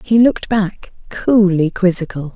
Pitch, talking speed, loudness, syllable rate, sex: 190 Hz, 130 wpm, -15 LUFS, 4.3 syllables/s, female